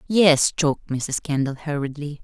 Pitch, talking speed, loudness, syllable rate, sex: 150 Hz, 135 wpm, -21 LUFS, 4.6 syllables/s, female